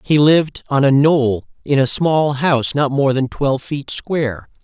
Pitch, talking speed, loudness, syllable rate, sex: 140 Hz, 195 wpm, -16 LUFS, 4.5 syllables/s, male